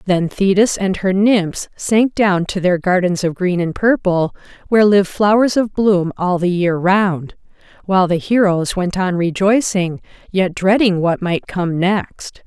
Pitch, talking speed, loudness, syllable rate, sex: 190 Hz, 170 wpm, -16 LUFS, 4.1 syllables/s, female